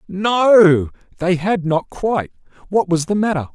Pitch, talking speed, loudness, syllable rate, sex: 180 Hz, 150 wpm, -17 LUFS, 4.1 syllables/s, male